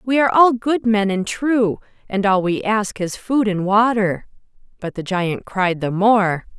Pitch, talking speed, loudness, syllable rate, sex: 205 Hz, 190 wpm, -18 LUFS, 4.4 syllables/s, female